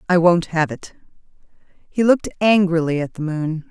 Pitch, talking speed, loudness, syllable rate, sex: 170 Hz, 160 wpm, -18 LUFS, 4.9 syllables/s, female